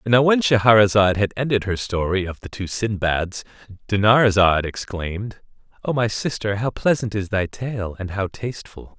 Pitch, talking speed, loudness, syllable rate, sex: 105 Hz, 160 wpm, -20 LUFS, 4.7 syllables/s, male